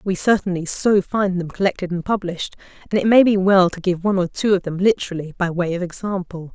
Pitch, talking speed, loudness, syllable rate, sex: 190 Hz, 230 wpm, -19 LUFS, 6.1 syllables/s, female